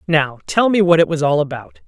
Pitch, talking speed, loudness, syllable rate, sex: 160 Hz, 255 wpm, -16 LUFS, 5.5 syllables/s, female